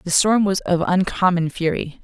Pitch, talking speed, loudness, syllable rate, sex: 180 Hz, 175 wpm, -19 LUFS, 4.8 syllables/s, female